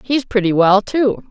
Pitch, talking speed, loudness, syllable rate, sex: 220 Hz, 185 wpm, -15 LUFS, 4.1 syllables/s, female